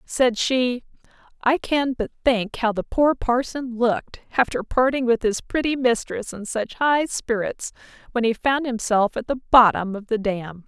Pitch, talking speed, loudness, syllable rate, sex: 235 Hz, 175 wpm, -22 LUFS, 4.4 syllables/s, female